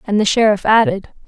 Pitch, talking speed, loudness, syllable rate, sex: 210 Hz, 190 wpm, -14 LUFS, 5.8 syllables/s, female